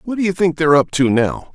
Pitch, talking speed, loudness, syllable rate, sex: 165 Hz, 310 wpm, -16 LUFS, 6.5 syllables/s, male